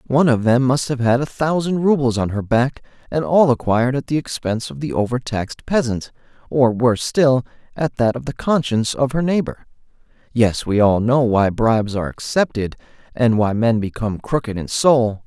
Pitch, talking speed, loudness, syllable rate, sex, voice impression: 125 Hz, 190 wpm, -18 LUFS, 5.4 syllables/s, male, very masculine, very middle-aged, very thick, slightly relaxed, very powerful, slightly bright, soft, slightly muffled, fluent, raspy, cool, very intellectual, slightly refreshing, sincere, very calm, mature, very friendly, reassuring, unique, elegant, wild, slightly sweet, lively, kind, slightly intense